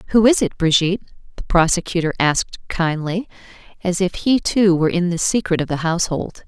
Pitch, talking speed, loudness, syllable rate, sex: 180 Hz, 175 wpm, -18 LUFS, 5.8 syllables/s, female